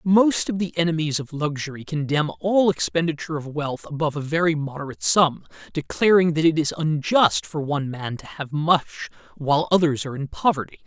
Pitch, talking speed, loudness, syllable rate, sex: 155 Hz, 175 wpm, -22 LUFS, 5.7 syllables/s, male